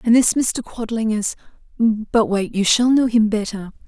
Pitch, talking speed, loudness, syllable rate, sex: 225 Hz, 170 wpm, -18 LUFS, 4.4 syllables/s, female